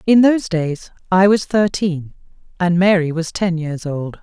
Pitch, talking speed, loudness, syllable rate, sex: 180 Hz, 170 wpm, -17 LUFS, 4.4 syllables/s, female